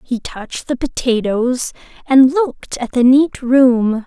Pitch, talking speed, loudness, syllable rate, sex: 255 Hz, 150 wpm, -15 LUFS, 3.9 syllables/s, female